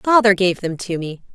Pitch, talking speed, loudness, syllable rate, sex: 195 Hz, 225 wpm, -18 LUFS, 5.0 syllables/s, female